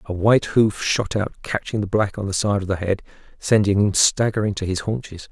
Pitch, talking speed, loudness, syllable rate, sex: 100 Hz, 225 wpm, -21 LUFS, 5.5 syllables/s, male